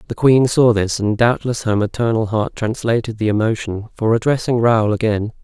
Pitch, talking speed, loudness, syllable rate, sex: 115 Hz, 175 wpm, -17 LUFS, 5.1 syllables/s, male